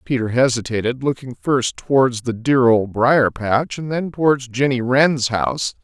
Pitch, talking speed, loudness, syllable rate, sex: 125 Hz, 165 wpm, -18 LUFS, 4.4 syllables/s, male